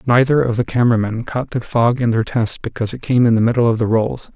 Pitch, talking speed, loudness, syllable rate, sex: 115 Hz, 275 wpm, -17 LUFS, 6.2 syllables/s, male